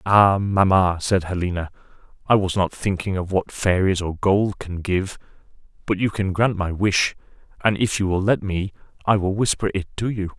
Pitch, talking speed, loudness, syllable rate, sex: 95 Hz, 190 wpm, -21 LUFS, 4.8 syllables/s, male